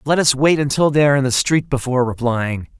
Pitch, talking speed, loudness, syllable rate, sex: 135 Hz, 235 wpm, -17 LUFS, 6.1 syllables/s, male